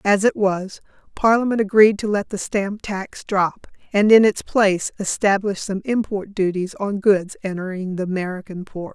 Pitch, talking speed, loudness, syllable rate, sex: 200 Hz, 170 wpm, -20 LUFS, 4.8 syllables/s, female